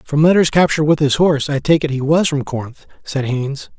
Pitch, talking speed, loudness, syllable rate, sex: 145 Hz, 240 wpm, -16 LUFS, 6.0 syllables/s, male